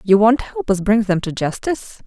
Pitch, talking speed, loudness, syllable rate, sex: 215 Hz, 230 wpm, -18 LUFS, 5.2 syllables/s, female